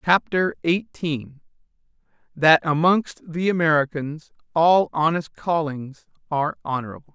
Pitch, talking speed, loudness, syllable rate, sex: 160 Hz, 90 wpm, -21 LUFS, 4.2 syllables/s, male